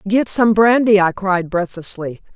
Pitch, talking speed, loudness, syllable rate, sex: 200 Hz, 155 wpm, -15 LUFS, 4.3 syllables/s, female